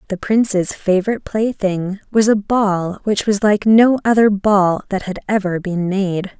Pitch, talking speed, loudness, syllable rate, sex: 200 Hz, 170 wpm, -16 LUFS, 4.3 syllables/s, female